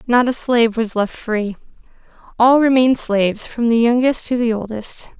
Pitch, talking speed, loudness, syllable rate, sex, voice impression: 230 Hz, 175 wpm, -17 LUFS, 5.0 syllables/s, female, feminine, slightly adult-like, slightly clear, slightly cute, slightly sincere, friendly